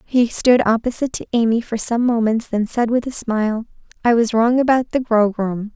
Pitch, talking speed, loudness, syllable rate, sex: 230 Hz, 200 wpm, -18 LUFS, 5.2 syllables/s, female